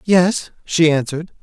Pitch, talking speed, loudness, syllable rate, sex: 165 Hz, 125 wpm, -17 LUFS, 4.5 syllables/s, male